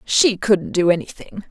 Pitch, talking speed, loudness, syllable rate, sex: 195 Hz, 160 wpm, -18 LUFS, 4.4 syllables/s, female